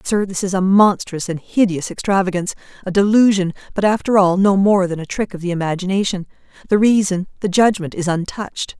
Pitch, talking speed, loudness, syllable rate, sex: 190 Hz, 185 wpm, -17 LUFS, 5.8 syllables/s, female